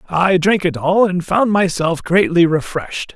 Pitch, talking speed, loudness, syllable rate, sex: 175 Hz, 170 wpm, -16 LUFS, 4.4 syllables/s, male